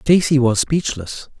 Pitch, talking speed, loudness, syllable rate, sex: 135 Hz, 130 wpm, -17 LUFS, 3.9 syllables/s, male